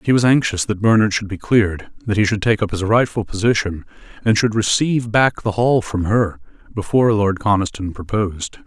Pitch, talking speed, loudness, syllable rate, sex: 105 Hz, 195 wpm, -18 LUFS, 5.5 syllables/s, male